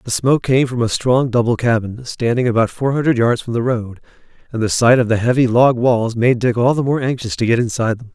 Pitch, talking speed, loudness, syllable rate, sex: 120 Hz, 250 wpm, -16 LUFS, 5.8 syllables/s, male